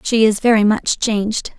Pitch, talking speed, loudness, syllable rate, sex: 215 Hz, 190 wpm, -16 LUFS, 4.7 syllables/s, female